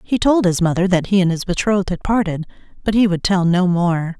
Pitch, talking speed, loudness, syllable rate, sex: 185 Hz, 245 wpm, -17 LUFS, 5.7 syllables/s, female